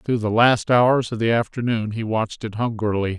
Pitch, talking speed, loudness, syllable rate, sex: 115 Hz, 205 wpm, -20 LUFS, 5.1 syllables/s, male